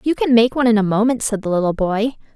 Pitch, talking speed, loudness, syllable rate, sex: 220 Hz, 280 wpm, -17 LUFS, 6.7 syllables/s, female